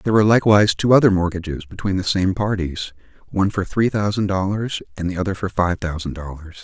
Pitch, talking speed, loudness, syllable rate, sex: 95 Hz, 200 wpm, -19 LUFS, 6.4 syllables/s, male